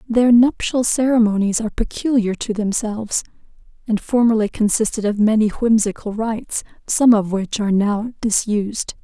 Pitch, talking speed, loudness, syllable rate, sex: 220 Hz, 135 wpm, -18 LUFS, 5.1 syllables/s, female